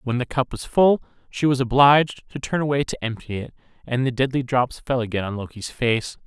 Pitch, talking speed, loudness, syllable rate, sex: 130 Hz, 220 wpm, -22 LUFS, 5.6 syllables/s, male